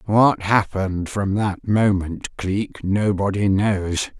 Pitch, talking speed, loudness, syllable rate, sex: 100 Hz, 115 wpm, -20 LUFS, 3.3 syllables/s, female